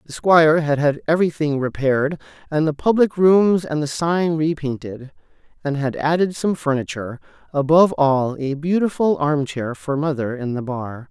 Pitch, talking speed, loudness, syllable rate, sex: 150 Hz, 150 wpm, -19 LUFS, 4.9 syllables/s, male